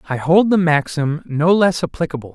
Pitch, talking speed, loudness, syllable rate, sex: 160 Hz, 180 wpm, -17 LUFS, 5.2 syllables/s, male